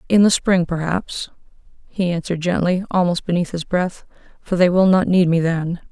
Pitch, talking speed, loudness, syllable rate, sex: 175 Hz, 170 wpm, -18 LUFS, 5.1 syllables/s, female